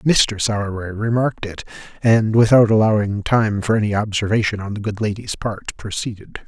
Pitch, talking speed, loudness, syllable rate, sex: 105 Hz, 155 wpm, -19 LUFS, 5.3 syllables/s, male